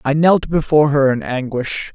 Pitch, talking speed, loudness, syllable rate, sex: 145 Hz, 185 wpm, -16 LUFS, 4.9 syllables/s, male